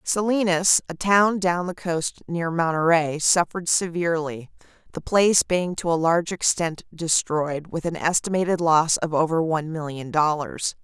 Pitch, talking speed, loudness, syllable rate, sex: 170 Hz, 150 wpm, -22 LUFS, 4.7 syllables/s, female